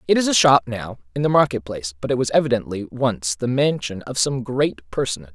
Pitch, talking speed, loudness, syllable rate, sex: 120 Hz, 225 wpm, -21 LUFS, 5.9 syllables/s, male